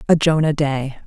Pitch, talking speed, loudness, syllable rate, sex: 145 Hz, 170 wpm, -18 LUFS, 5.0 syllables/s, female